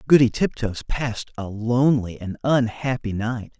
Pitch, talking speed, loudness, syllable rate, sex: 120 Hz, 135 wpm, -23 LUFS, 4.7 syllables/s, male